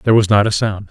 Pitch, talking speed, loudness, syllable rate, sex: 105 Hz, 330 wpm, -14 LUFS, 6.9 syllables/s, male